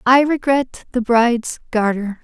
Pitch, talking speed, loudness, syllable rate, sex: 240 Hz, 135 wpm, -17 LUFS, 4.1 syllables/s, female